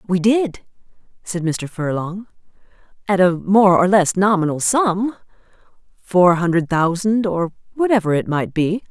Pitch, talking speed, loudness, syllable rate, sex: 185 Hz, 130 wpm, -18 LUFS, 4.3 syllables/s, female